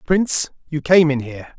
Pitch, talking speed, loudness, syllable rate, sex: 150 Hz, 190 wpm, -18 LUFS, 5.6 syllables/s, male